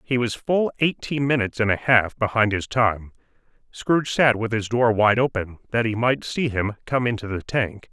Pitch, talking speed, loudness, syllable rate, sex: 115 Hz, 205 wpm, -22 LUFS, 4.9 syllables/s, male